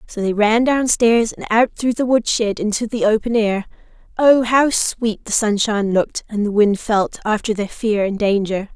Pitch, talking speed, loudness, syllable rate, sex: 220 Hz, 200 wpm, -17 LUFS, 4.7 syllables/s, female